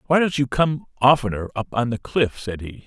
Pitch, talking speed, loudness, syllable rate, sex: 125 Hz, 230 wpm, -21 LUFS, 5.3 syllables/s, male